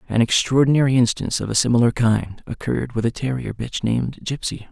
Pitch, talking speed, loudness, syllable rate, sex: 125 Hz, 180 wpm, -20 LUFS, 6.1 syllables/s, male